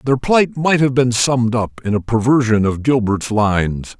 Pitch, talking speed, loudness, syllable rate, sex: 120 Hz, 195 wpm, -16 LUFS, 4.7 syllables/s, male